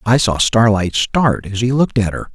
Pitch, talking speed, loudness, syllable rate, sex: 110 Hz, 230 wpm, -15 LUFS, 5.0 syllables/s, male